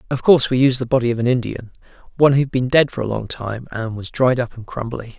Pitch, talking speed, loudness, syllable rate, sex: 125 Hz, 280 wpm, -18 LUFS, 6.5 syllables/s, male